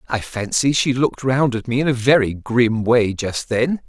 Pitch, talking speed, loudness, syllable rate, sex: 125 Hz, 215 wpm, -18 LUFS, 4.6 syllables/s, male